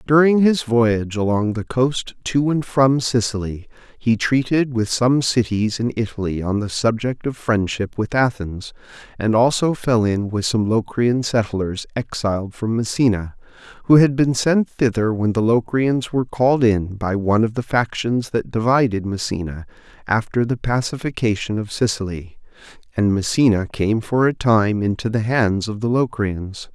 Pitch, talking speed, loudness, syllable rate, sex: 115 Hz, 160 wpm, -19 LUFS, 4.6 syllables/s, male